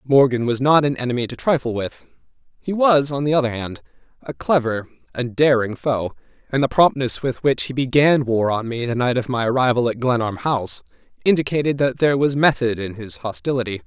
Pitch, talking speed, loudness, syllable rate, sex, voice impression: 125 Hz, 195 wpm, -19 LUFS, 5.6 syllables/s, male, masculine, adult-like, slightly tensed, fluent, intellectual, slightly friendly, lively